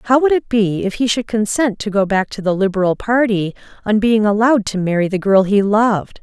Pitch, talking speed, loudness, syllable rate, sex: 210 Hz, 230 wpm, -16 LUFS, 5.6 syllables/s, female